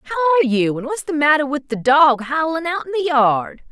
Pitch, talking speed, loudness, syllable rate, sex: 295 Hz, 240 wpm, -17 LUFS, 7.2 syllables/s, female